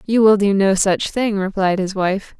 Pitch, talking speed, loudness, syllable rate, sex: 200 Hz, 225 wpm, -17 LUFS, 4.5 syllables/s, female